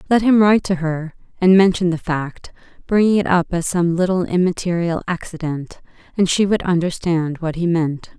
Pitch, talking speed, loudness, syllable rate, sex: 175 Hz, 175 wpm, -18 LUFS, 5.0 syllables/s, female